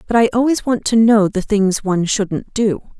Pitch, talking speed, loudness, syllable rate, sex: 210 Hz, 220 wpm, -16 LUFS, 4.8 syllables/s, female